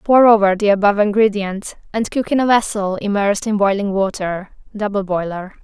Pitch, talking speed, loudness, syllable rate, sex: 205 Hz, 170 wpm, -17 LUFS, 5.3 syllables/s, female